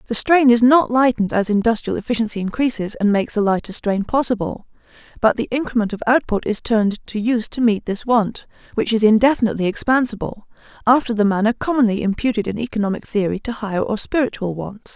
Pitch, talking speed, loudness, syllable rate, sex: 225 Hz, 180 wpm, -18 LUFS, 6.3 syllables/s, female